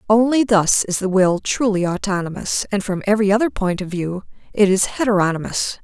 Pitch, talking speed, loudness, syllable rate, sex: 200 Hz, 175 wpm, -18 LUFS, 5.5 syllables/s, female